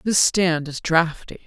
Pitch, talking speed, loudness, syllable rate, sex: 170 Hz, 165 wpm, -20 LUFS, 3.9 syllables/s, female